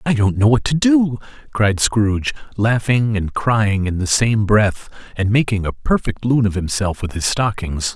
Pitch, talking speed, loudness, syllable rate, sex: 110 Hz, 190 wpm, -17 LUFS, 4.5 syllables/s, male